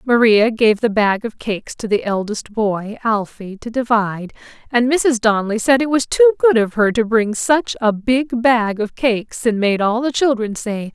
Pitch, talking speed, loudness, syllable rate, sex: 230 Hz, 205 wpm, -17 LUFS, 4.6 syllables/s, female